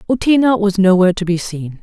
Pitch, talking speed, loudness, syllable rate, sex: 195 Hz, 195 wpm, -14 LUFS, 6.1 syllables/s, female